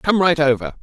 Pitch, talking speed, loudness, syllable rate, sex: 150 Hz, 220 wpm, -17 LUFS, 5.4 syllables/s, male